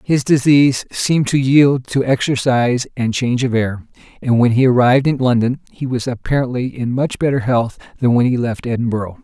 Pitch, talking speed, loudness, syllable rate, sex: 125 Hz, 190 wpm, -16 LUFS, 5.4 syllables/s, male